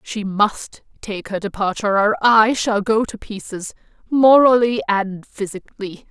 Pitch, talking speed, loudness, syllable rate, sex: 210 Hz, 140 wpm, -17 LUFS, 4.3 syllables/s, female